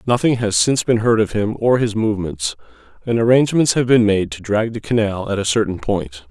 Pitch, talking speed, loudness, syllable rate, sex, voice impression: 110 Hz, 220 wpm, -17 LUFS, 5.6 syllables/s, male, masculine, adult-like, slightly thick, sincere, slightly calm, slightly kind